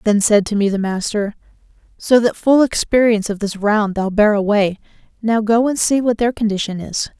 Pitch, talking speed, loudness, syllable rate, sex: 215 Hz, 200 wpm, -16 LUFS, 5.2 syllables/s, female